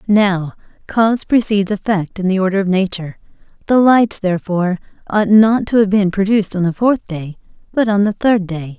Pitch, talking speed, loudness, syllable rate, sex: 200 Hz, 185 wpm, -15 LUFS, 5.4 syllables/s, female